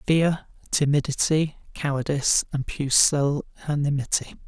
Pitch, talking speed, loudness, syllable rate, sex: 145 Hz, 65 wpm, -23 LUFS, 4.3 syllables/s, male